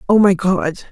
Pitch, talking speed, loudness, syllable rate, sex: 185 Hz, 195 wpm, -15 LUFS, 5.2 syllables/s, female